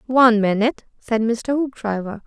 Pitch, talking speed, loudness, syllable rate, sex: 230 Hz, 135 wpm, -19 LUFS, 5.1 syllables/s, female